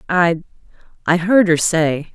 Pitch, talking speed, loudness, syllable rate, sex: 170 Hz, 110 wpm, -16 LUFS, 4.0 syllables/s, female